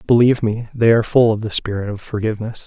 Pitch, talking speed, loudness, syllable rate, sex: 110 Hz, 225 wpm, -17 LUFS, 6.9 syllables/s, male